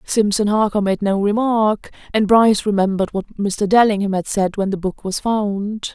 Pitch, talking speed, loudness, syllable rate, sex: 205 Hz, 180 wpm, -18 LUFS, 4.9 syllables/s, female